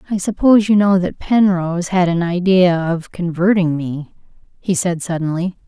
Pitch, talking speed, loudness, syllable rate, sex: 180 Hz, 160 wpm, -16 LUFS, 4.9 syllables/s, female